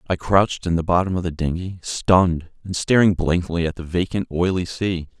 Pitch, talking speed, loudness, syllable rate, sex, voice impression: 90 Hz, 195 wpm, -21 LUFS, 5.0 syllables/s, male, very masculine, very adult-like, slightly thick, slightly relaxed, slightly weak, slightly dark, soft, slightly clear, fluent, cool, very intellectual, slightly refreshing, sincere, very calm, slightly mature, friendly, reassuring, slightly unique, elegant, slightly wild, sweet, slightly lively, kind, modest